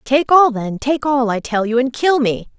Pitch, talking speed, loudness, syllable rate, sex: 250 Hz, 230 wpm, -16 LUFS, 4.6 syllables/s, female